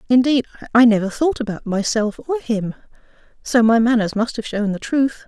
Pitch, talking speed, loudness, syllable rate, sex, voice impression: 230 Hz, 180 wpm, -18 LUFS, 5.1 syllables/s, female, feminine, adult-like, slightly relaxed, slightly dark, soft, clear, fluent, intellectual, calm, friendly, elegant, lively, modest